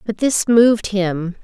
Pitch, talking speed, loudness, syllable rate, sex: 205 Hz, 165 wpm, -16 LUFS, 3.9 syllables/s, female